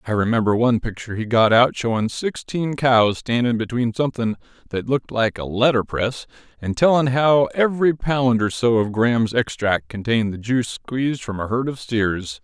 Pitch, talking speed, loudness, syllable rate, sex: 120 Hz, 185 wpm, -20 LUFS, 5.2 syllables/s, male